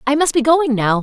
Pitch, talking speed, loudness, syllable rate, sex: 270 Hz, 290 wpm, -15 LUFS, 5.5 syllables/s, female